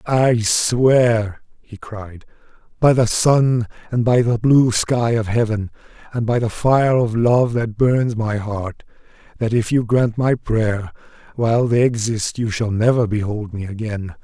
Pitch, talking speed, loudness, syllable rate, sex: 115 Hz, 165 wpm, -18 LUFS, 3.8 syllables/s, male